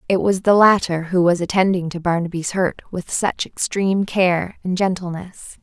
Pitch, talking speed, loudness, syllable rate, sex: 180 Hz, 170 wpm, -19 LUFS, 4.8 syllables/s, female